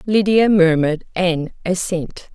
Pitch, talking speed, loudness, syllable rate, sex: 180 Hz, 100 wpm, -17 LUFS, 4.0 syllables/s, female